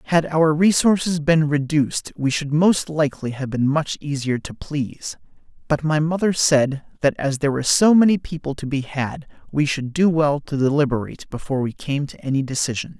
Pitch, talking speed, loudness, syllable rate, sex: 145 Hz, 190 wpm, -20 LUFS, 5.3 syllables/s, male